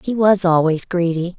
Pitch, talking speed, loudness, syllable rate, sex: 180 Hz, 175 wpm, -17 LUFS, 4.7 syllables/s, female